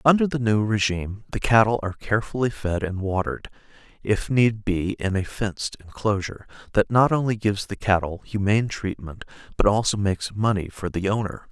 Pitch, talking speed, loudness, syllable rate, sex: 105 Hz, 170 wpm, -23 LUFS, 5.6 syllables/s, male